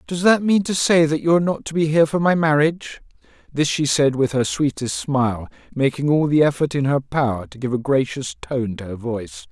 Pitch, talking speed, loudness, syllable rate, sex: 140 Hz, 235 wpm, -19 LUFS, 5.6 syllables/s, male